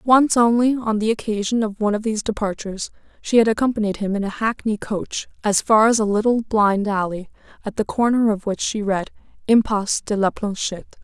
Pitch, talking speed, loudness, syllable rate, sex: 215 Hz, 195 wpm, -20 LUFS, 5.6 syllables/s, female